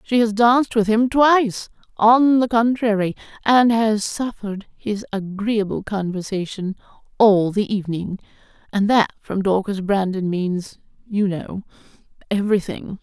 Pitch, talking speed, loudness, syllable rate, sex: 210 Hz, 125 wpm, -19 LUFS, 4.4 syllables/s, female